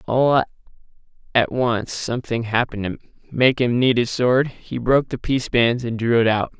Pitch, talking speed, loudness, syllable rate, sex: 120 Hz, 190 wpm, -20 LUFS, 5.3 syllables/s, male